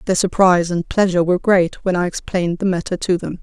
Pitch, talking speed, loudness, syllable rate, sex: 180 Hz, 230 wpm, -17 LUFS, 6.4 syllables/s, female